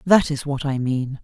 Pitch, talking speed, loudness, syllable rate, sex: 145 Hz, 245 wpm, -21 LUFS, 4.5 syllables/s, female